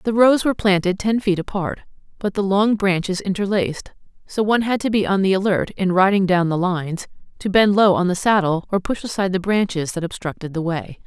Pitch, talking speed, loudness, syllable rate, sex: 190 Hz, 215 wpm, -19 LUFS, 5.8 syllables/s, female